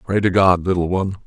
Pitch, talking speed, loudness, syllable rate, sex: 95 Hz, 240 wpm, -17 LUFS, 6.5 syllables/s, male